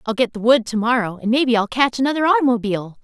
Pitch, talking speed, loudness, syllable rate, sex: 240 Hz, 235 wpm, -18 LUFS, 7.0 syllables/s, female